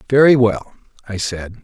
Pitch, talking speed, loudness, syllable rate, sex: 115 Hz, 145 wpm, -15 LUFS, 4.6 syllables/s, male